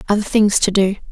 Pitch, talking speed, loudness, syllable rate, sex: 205 Hz, 215 wpm, -16 LUFS, 6.2 syllables/s, female